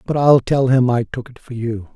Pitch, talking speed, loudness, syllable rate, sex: 125 Hz, 275 wpm, -17 LUFS, 5.0 syllables/s, male